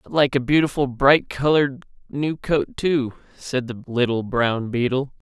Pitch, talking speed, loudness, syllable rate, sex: 135 Hz, 160 wpm, -21 LUFS, 4.5 syllables/s, male